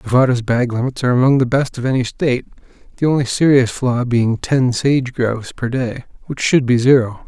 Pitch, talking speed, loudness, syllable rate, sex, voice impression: 125 Hz, 200 wpm, -16 LUFS, 5.5 syllables/s, male, masculine, adult-like, slightly soft, sincere, friendly, kind